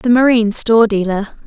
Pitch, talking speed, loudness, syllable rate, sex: 225 Hz, 165 wpm, -13 LUFS, 5.9 syllables/s, female